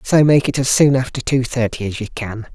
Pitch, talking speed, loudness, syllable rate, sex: 125 Hz, 260 wpm, -17 LUFS, 5.6 syllables/s, male